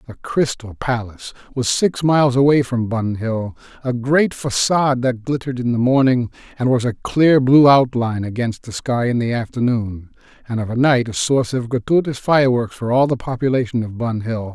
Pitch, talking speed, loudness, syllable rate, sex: 125 Hz, 190 wpm, -18 LUFS, 5.2 syllables/s, male